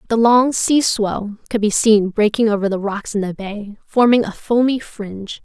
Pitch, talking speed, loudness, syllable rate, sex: 215 Hz, 200 wpm, -17 LUFS, 4.6 syllables/s, female